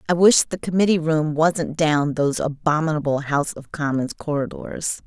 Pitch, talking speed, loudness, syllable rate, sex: 155 Hz, 155 wpm, -21 LUFS, 5.0 syllables/s, female